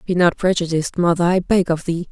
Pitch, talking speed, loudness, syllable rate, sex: 175 Hz, 225 wpm, -18 LUFS, 6.1 syllables/s, female